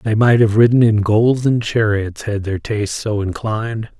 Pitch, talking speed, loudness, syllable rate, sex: 110 Hz, 180 wpm, -16 LUFS, 4.6 syllables/s, male